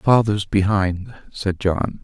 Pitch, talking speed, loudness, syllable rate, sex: 100 Hz, 120 wpm, -20 LUFS, 3.1 syllables/s, male